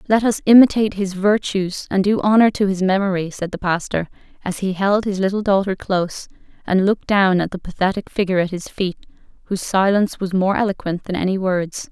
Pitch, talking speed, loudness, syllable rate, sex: 190 Hz, 195 wpm, -18 LUFS, 5.9 syllables/s, female